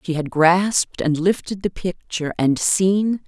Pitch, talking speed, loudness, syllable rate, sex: 175 Hz, 165 wpm, -19 LUFS, 4.3 syllables/s, female